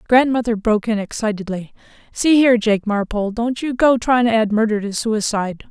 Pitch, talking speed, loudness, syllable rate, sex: 225 Hz, 180 wpm, -18 LUFS, 5.7 syllables/s, female